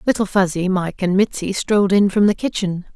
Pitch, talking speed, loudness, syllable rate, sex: 195 Hz, 205 wpm, -18 LUFS, 5.5 syllables/s, female